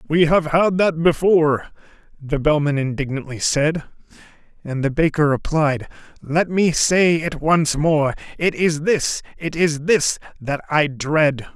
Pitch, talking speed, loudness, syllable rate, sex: 155 Hz, 145 wpm, -19 LUFS, 4.0 syllables/s, male